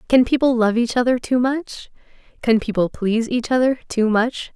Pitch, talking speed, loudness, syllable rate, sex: 240 Hz, 185 wpm, -19 LUFS, 5.1 syllables/s, female